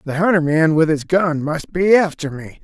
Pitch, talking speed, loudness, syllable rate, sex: 160 Hz, 225 wpm, -17 LUFS, 4.8 syllables/s, male